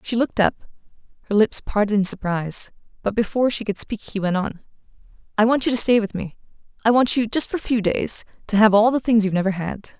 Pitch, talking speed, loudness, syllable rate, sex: 215 Hz, 230 wpm, -20 LUFS, 6.3 syllables/s, female